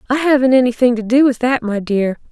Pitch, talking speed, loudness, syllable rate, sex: 245 Hz, 235 wpm, -14 LUFS, 5.9 syllables/s, female